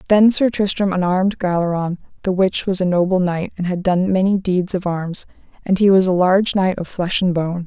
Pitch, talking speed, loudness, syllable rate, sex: 185 Hz, 220 wpm, -18 LUFS, 5.4 syllables/s, female